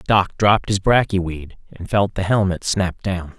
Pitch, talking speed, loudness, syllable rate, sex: 95 Hz, 195 wpm, -19 LUFS, 4.6 syllables/s, male